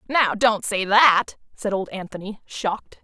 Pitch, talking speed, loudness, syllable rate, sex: 210 Hz, 160 wpm, -21 LUFS, 4.3 syllables/s, female